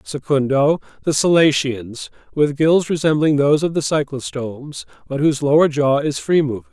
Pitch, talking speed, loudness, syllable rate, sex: 145 Hz, 150 wpm, -17 LUFS, 5.1 syllables/s, male